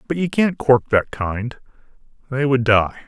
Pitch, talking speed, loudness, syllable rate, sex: 130 Hz, 175 wpm, -19 LUFS, 4.3 syllables/s, male